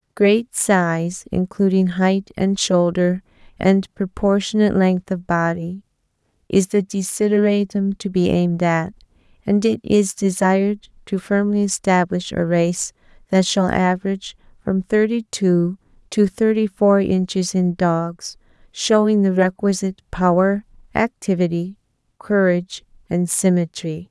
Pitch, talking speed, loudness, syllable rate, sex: 190 Hz, 115 wpm, -19 LUFS, 4.2 syllables/s, female